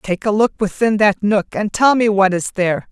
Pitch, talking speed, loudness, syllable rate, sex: 205 Hz, 245 wpm, -16 LUFS, 5.0 syllables/s, female